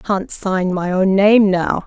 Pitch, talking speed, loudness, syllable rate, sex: 195 Hz, 225 wpm, -16 LUFS, 4.0 syllables/s, female